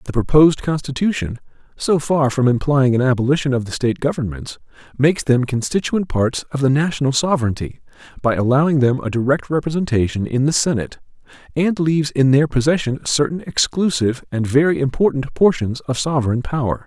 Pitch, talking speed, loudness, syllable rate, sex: 135 Hz, 155 wpm, -18 LUFS, 5.9 syllables/s, male